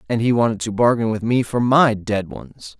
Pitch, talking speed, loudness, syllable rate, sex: 110 Hz, 235 wpm, -18 LUFS, 5.0 syllables/s, male